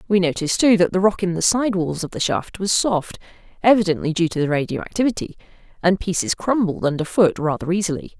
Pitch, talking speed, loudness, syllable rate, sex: 185 Hz, 200 wpm, -20 LUFS, 5.9 syllables/s, female